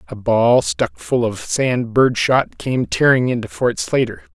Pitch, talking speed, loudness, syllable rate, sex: 120 Hz, 180 wpm, -17 LUFS, 3.9 syllables/s, male